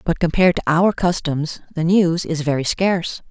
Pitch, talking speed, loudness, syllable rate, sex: 165 Hz, 180 wpm, -18 LUFS, 5.1 syllables/s, female